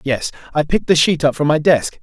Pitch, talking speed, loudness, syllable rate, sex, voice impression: 150 Hz, 265 wpm, -16 LUFS, 5.9 syllables/s, male, masculine, adult-like, slightly fluent, cool, refreshing, sincere